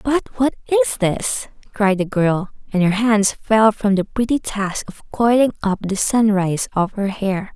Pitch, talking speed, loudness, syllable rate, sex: 205 Hz, 185 wpm, -18 LUFS, 4.3 syllables/s, female